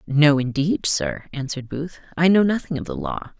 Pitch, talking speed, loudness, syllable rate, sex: 140 Hz, 195 wpm, -21 LUFS, 5.0 syllables/s, female